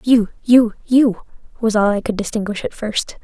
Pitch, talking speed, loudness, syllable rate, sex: 220 Hz, 185 wpm, -17 LUFS, 4.8 syllables/s, female